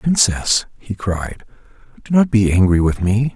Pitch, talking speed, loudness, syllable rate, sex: 110 Hz, 160 wpm, -16 LUFS, 4.2 syllables/s, male